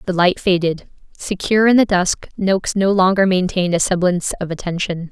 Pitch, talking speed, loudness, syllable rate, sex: 185 Hz, 175 wpm, -17 LUFS, 5.8 syllables/s, female